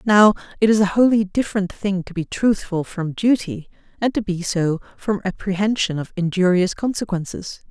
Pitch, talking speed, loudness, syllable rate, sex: 195 Hz, 165 wpm, -20 LUFS, 5.1 syllables/s, female